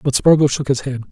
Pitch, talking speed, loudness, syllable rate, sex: 130 Hz, 270 wpm, -16 LUFS, 6.3 syllables/s, male